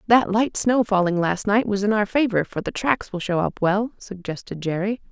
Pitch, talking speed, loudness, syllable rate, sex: 205 Hz, 225 wpm, -22 LUFS, 5.0 syllables/s, female